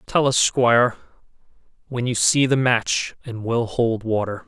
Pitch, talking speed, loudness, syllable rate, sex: 120 Hz, 160 wpm, -20 LUFS, 4.2 syllables/s, male